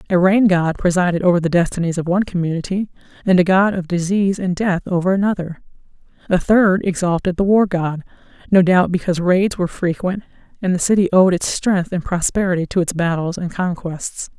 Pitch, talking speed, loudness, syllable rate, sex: 180 Hz, 185 wpm, -17 LUFS, 5.7 syllables/s, female